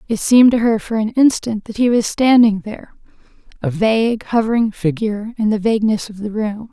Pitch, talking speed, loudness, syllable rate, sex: 220 Hz, 190 wpm, -16 LUFS, 5.7 syllables/s, female